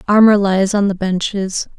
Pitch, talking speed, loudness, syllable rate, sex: 195 Hz, 170 wpm, -15 LUFS, 4.5 syllables/s, female